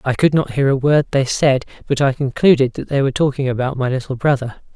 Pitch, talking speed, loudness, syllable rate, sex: 135 Hz, 240 wpm, -17 LUFS, 6.0 syllables/s, male